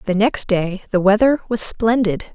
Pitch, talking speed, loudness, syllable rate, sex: 210 Hz, 180 wpm, -17 LUFS, 4.7 syllables/s, female